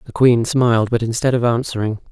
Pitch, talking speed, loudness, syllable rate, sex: 120 Hz, 200 wpm, -17 LUFS, 5.8 syllables/s, male